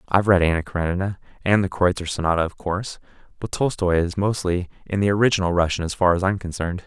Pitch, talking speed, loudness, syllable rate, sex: 90 Hz, 200 wpm, -22 LUFS, 6.8 syllables/s, male